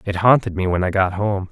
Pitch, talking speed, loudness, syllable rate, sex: 100 Hz, 275 wpm, -18 LUFS, 5.7 syllables/s, male